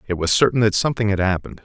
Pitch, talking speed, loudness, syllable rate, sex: 100 Hz, 255 wpm, -18 LUFS, 8.1 syllables/s, male